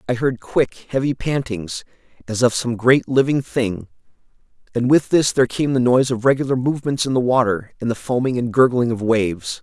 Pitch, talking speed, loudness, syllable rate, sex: 125 Hz, 195 wpm, -19 LUFS, 5.5 syllables/s, male